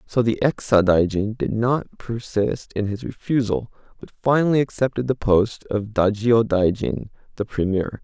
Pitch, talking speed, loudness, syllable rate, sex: 110 Hz, 140 wpm, -21 LUFS, 4.5 syllables/s, male